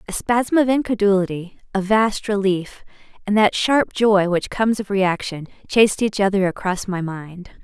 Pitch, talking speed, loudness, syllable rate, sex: 200 Hz, 165 wpm, -19 LUFS, 4.8 syllables/s, female